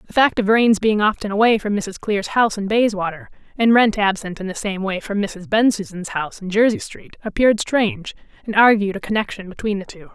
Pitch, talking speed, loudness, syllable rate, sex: 205 Hz, 215 wpm, -19 LUFS, 5.6 syllables/s, female